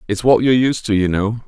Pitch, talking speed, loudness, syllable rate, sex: 110 Hz, 285 wpm, -16 LUFS, 6.2 syllables/s, male